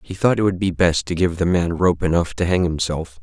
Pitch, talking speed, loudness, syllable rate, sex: 90 Hz, 280 wpm, -19 LUFS, 5.4 syllables/s, male